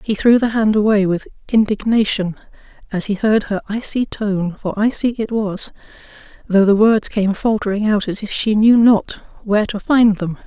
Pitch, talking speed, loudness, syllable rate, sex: 210 Hz, 185 wpm, -17 LUFS, 4.8 syllables/s, female